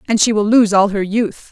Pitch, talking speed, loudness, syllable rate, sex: 210 Hz, 275 wpm, -14 LUFS, 5.2 syllables/s, female